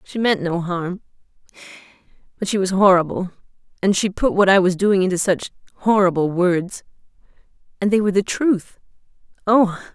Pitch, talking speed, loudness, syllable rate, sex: 190 Hz, 135 wpm, -19 LUFS, 5.3 syllables/s, female